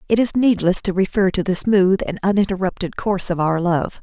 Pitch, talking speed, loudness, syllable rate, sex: 190 Hz, 210 wpm, -18 LUFS, 5.5 syllables/s, female